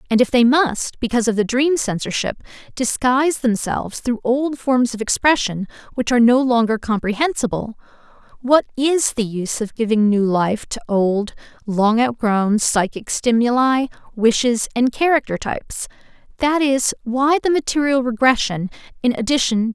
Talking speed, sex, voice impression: 150 wpm, female, very feminine, slightly adult-like, slightly bright, slightly fluent, slightly cute, slightly unique